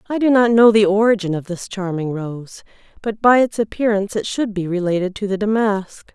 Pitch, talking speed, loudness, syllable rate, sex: 205 Hz, 205 wpm, -18 LUFS, 5.4 syllables/s, female